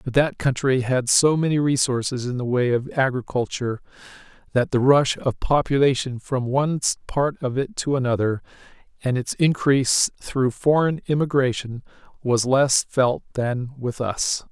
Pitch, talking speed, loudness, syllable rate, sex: 130 Hz, 150 wpm, -21 LUFS, 4.6 syllables/s, male